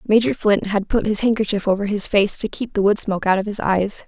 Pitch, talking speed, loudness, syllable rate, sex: 205 Hz, 265 wpm, -19 LUFS, 5.8 syllables/s, female